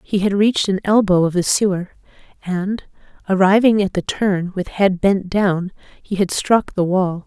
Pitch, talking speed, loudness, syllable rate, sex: 190 Hz, 180 wpm, -18 LUFS, 4.5 syllables/s, female